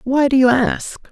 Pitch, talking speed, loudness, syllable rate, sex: 255 Hz, 215 wpm, -15 LUFS, 4.3 syllables/s, female